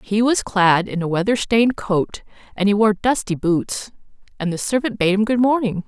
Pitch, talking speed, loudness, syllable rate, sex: 205 Hz, 205 wpm, -19 LUFS, 5.0 syllables/s, female